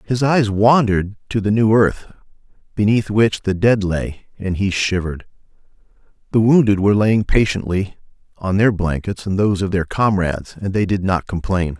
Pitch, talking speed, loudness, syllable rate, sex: 100 Hz, 170 wpm, -17 LUFS, 5.1 syllables/s, male